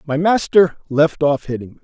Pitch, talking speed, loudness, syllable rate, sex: 150 Hz, 195 wpm, -16 LUFS, 5.1 syllables/s, male